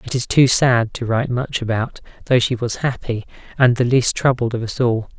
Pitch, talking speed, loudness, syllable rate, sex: 120 Hz, 220 wpm, -18 LUFS, 5.2 syllables/s, male